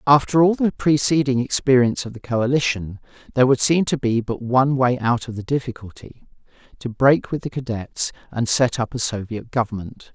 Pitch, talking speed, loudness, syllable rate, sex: 125 Hz, 175 wpm, -20 LUFS, 5.5 syllables/s, male